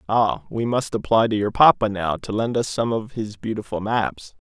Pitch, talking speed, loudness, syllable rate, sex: 110 Hz, 215 wpm, -21 LUFS, 4.8 syllables/s, male